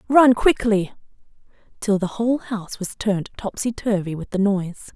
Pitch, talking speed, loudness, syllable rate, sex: 210 Hz, 145 wpm, -21 LUFS, 5.4 syllables/s, female